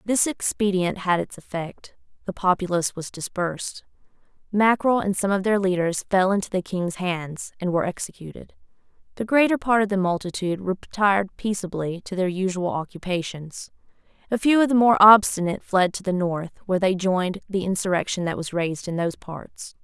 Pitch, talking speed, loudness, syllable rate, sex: 190 Hz, 170 wpm, -23 LUFS, 5.4 syllables/s, female